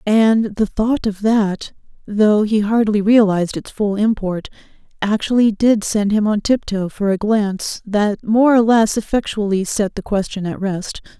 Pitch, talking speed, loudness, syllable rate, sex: 210 Hz, 160 wpm, -17 LUFS, 4.3 syllables/s, female